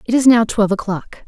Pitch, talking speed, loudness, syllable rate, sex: 220 Hz, 235 wpm, -16 LUFS, 6.1 syllables/s, female